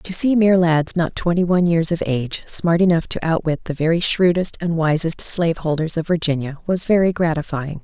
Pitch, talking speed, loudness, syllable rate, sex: 165 Hz, 200 wpm, -18 LUFS, 5.5 syllables/s, female